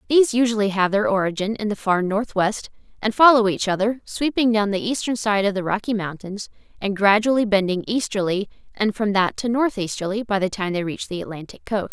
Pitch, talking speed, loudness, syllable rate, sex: 205 Hz, 195 wpm, -21 LUFS, 5.7 syllables/s, female